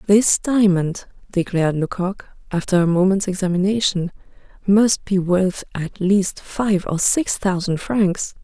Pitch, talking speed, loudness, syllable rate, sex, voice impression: 190 Hz, 130 wpm, -19 LUFS, 4.1 syllables/s, female, feminine, adult-like, relaxed, slightly bright, soft, fluent, slightly raspy, intellectual, calm, friendly, reassuring, elegant, kind, slightly modest